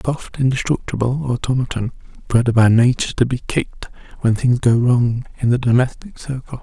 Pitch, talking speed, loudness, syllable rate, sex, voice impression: 125 Hz, 165 wpm, -18 LUFS, 5.9 syllables/s, male, masculine, adult-like, slightly muffled, slightly refreshing, sincere, calm, slightly sweet, kind